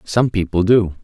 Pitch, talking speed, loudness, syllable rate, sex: 100 Hz, 175 wpm, -17 LUFS, 4.5 syllables/s, male